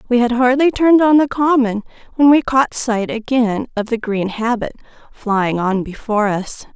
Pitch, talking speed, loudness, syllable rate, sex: 235 Hz, 180 wpm, -16 LUFS, 4.8 syllables/s, female